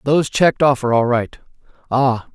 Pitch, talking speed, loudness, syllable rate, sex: 130 Hz, 155 wpm, -17 LUFS, 6.8 syllables/s, male